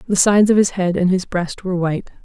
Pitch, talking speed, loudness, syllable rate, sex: 185 Hz, 270 wpm, -17 LUFS, 6.6 syllables/s, female